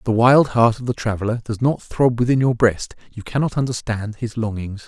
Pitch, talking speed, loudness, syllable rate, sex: 115 Hz, 210 wpm, -19 LUFS, 5.3 syllables/s, male